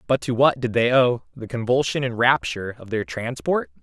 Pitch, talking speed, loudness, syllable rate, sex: 115 Hz, 205 wpm, -22 LUFS, 5.1 syllables/s, male